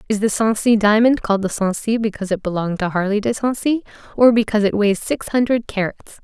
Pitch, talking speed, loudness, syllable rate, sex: 215 Hz, 200 wpm, -18 LUFS, 6.1 syllables/s, female